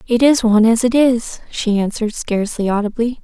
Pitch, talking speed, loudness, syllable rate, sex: 225 Hz, 185 wpm, -16 LUFS, 5.8 syllables/s, female